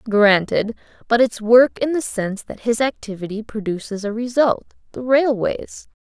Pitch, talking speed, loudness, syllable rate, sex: 230 Hz, 140 wpm, -19 LUFS, 4.8 syllables/s, female